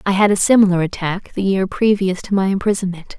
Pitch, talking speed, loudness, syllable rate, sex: 195 Hz, 205 wpm, -17 LUFS, 5.9 syllables/s, female